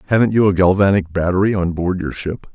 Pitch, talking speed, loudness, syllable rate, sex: 95 Hz, 215 wpm, -17 LUFS, 6.2 syllables/s, male